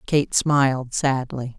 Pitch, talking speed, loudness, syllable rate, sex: 135 Hz, 115 wpm, -21 LUFS, 3.5 syllables/s, female